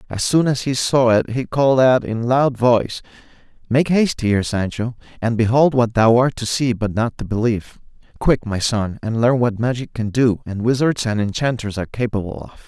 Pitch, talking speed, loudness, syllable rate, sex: 120 Hz, 210 wpm, -18 LUFS, 5.4 syllables/s, male